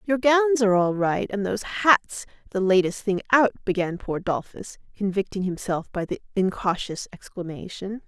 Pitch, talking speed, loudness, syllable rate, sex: 200 Hz, 155 wpm, -24 LUFS, 4.8 syllables/s, female